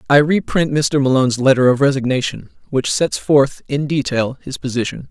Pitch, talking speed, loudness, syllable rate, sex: 135 Hz, 165 wpm, -17 LUFS, 5.2 syllables/s, male